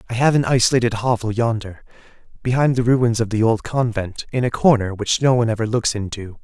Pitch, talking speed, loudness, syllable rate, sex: 115 Hz, 205 wpm, -19 LUFS, 5.9 syllables/s, male